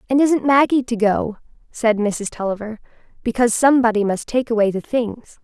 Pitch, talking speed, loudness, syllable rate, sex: 230 Hz, 165 wpm, -18 LUFS, 5.4 syllables/s, female